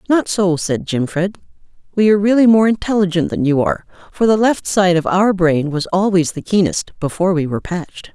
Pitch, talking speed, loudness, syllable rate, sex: 185 Hz, 200 wpm, -16 LUFS, 5.7 syllables/s, female